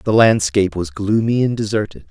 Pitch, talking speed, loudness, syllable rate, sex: 105 Hz, 170 wpm, -17 LUFS, 5.4 syllables/s, male